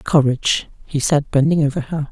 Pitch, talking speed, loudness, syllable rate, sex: 145 Hz, 170 wpm, -18 LUFS, 5.2 syllables/s, female